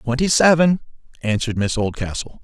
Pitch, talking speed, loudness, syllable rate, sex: 130 Hz, 125 wpm, -19 LUFS, 5.7 syllables/s, male